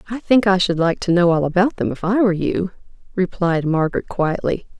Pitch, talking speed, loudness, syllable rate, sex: 185 Hz, 215 wpm, -18 LUFS, 5.6 syllables/s, female